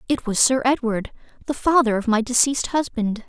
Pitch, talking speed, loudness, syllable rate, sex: 245 Hz, 185 wpm, -20 LUFS, 5.4 syllables/s, female